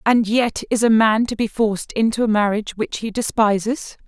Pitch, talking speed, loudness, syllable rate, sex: 220 Hz, 205 wpm, -19 LUFS, 5.2 syllables/s, female